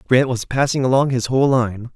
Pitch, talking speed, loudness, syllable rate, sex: 130 Hz, 215 wpm, -18 LUFS, 5.6 syllables/s, male